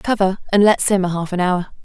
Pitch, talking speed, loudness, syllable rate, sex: 190 Hz, 230 wpm, -17 LUFS, 5.6 syllables/s, female